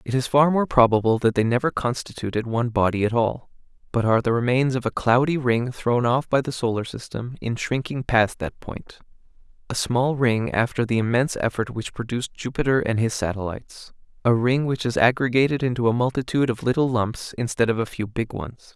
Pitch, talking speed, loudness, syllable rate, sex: 120 Hz, 200 wpm, -22 LUFS, 5.6 syllables/s, male